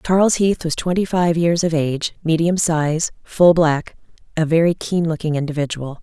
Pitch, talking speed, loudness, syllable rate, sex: 165 Hz, 170 wpm, -18 LUFS, 5.0 syllables/s, female